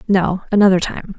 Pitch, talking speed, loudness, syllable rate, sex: 190 Hz, 150 wpm, -16 LUFS, 5.2 syllables/s, female